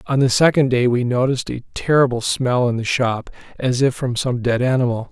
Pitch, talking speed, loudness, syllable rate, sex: 125 Hz, 210 wpm, -18 LUFS, 5.5 syllables/s, male